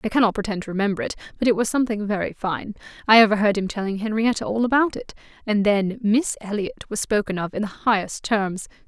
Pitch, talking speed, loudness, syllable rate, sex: 215 Hz, 205 wpm, -22 LUFS, 6.3 syllables/s, female